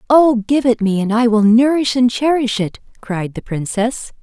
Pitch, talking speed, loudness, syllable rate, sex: 235 Hz, 200 wpm, -15 LUFS, 4.5 syllables/s, female